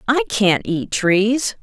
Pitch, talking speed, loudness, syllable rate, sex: 205 Hz, 150 wpm, -17 LUFS, 2.8 syllables/s, female